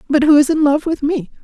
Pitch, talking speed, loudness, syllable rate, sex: 295 Hz, 290 wpm, -14 LUFS, 6.2 syllables/s, female